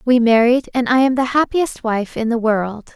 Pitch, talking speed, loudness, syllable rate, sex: 240 Hz, 225 wpm, -17 LUFS, 4.6 syllables/s, female